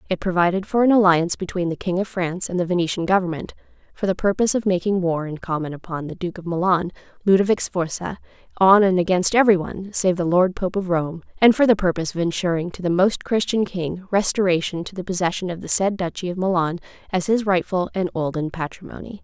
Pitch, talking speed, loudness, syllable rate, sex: 180 Hz, 210 wpm, -21 LUFS, 6.2 syllables/s, female